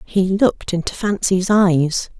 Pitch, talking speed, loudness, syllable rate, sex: 190 Hz, 135 wpm, -17 LUFS, 4.0 syllables/s, female